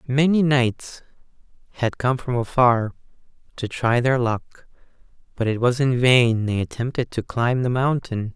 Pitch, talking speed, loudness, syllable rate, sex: 125 Hz, 150 wpm, -21 LUFS, 4.2 syllables/s, male